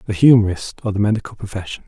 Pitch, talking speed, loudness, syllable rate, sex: 105 Hz, 190 wpm, -18 LUFS, 7.2 syllables/s, male